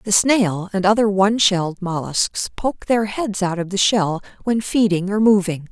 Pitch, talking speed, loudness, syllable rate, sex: 200 Hz, 190 wpm, -18 LUFS, 4.6 syllables/s, female